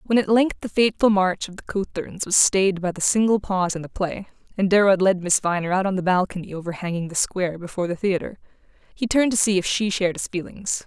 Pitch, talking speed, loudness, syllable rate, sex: 190 Hz, 240 wpm, -22 LUFS, 6.3 syllables/s, female